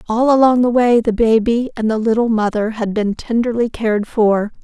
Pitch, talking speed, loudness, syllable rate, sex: 225 Hz, 195 wpm, -16 LUFS, 5.1 syllables/s, female